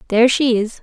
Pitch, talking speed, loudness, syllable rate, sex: 235 Hz, 220 wpm, -15 LUFS, 6.6 syllables/s, female